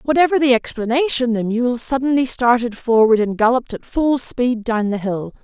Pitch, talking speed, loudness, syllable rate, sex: 240 Hz, 175 wpm, -17 LUFS, 5.1 syllables/s, female